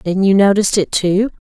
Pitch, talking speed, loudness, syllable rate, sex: 195 Hz, 205 wpm, -14 LUFS, 5.8 syllables/s, female